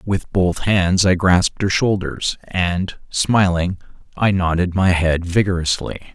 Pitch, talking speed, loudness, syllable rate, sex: 90 Hz, 135 wpm, -18 LUFS, 3.9 syllables/s, male